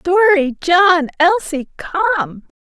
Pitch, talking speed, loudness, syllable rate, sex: 335 Hz, 70 wpm, -15 LUFS, 2.6 syllables/s, female